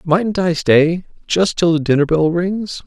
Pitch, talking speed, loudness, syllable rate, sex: 170 Hz, 190 wpm, -16 LUFS, 3.9 syllables/s, male